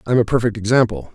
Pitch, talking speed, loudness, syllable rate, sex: 115 Hz, 210 wpm, -18 LUFS, 6.9 syllables/s, male